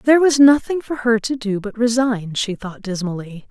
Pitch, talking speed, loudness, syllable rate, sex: 230 Hz, 205 wpm, -18 LUFS, 5.0 syllables/s, female